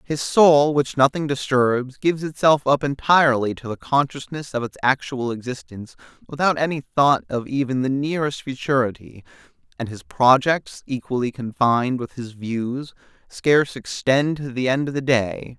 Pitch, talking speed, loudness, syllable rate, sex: 135 Hz, 155 wpm, -21 LUFS, 4.8 syllables/s, male